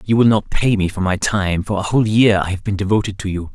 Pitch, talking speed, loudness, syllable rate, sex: 100 Hz, 285 wpm, -17 LUFS, 6.1 syllables/s, male